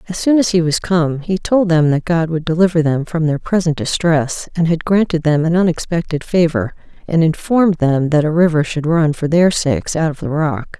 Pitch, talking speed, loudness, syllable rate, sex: 165 Hz, 220 wpm, -16 LUFS, 5.2 syllables/s, female